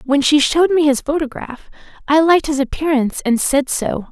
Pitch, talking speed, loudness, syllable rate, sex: 295 Hz, 190 wpm, -16 LUFS, 5.5 syllables/s, female